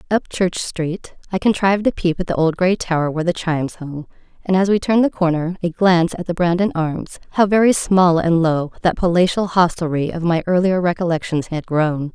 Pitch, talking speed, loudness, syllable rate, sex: 175 Hz, 210 wpm, -18 LUFS, 5.5 syllables/s, female